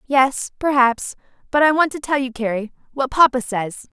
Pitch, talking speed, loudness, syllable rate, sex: 260 Hz, 165 wpm, -19 LUFS, 4.8 syllables/s, female